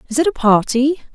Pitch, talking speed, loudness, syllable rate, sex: 265 Hz, 210 wpm, -16 LUFS, 5.9 syllables/s, female